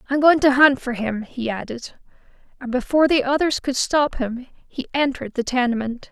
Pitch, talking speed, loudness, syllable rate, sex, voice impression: 260 Hz, 185 wpm, -20 LUFS, 5.4 syllables/s, female, very feminine, young, adult-like, very thin, tensed, slightly weak, bright, hard, slightly muffled, fluent, slightly raspy, very cute, intellectual, very refreshing, slightly sincere, slightly calm, friendly, reassuring, very unique, elegant, wild, very sweet, lively, very strict, slightly intense, sharp, very light